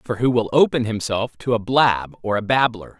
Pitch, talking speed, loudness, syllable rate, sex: 115 Hz, 220 wpm, -20 LUFS, 4.9 syllables/s, male